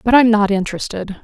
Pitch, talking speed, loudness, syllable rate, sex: 210 Hz, 195 wpm, -16 LUFS, 6.4 syllables/s, female